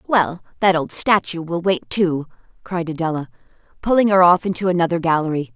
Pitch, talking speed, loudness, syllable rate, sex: 170 Hz, 160 wpm, -19 LUFS, 5.4 syllables/s, female